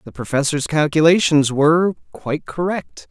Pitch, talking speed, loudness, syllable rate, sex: 150 Hz, 115 wpm, -17 LUFS, 5.0 syllables/s, male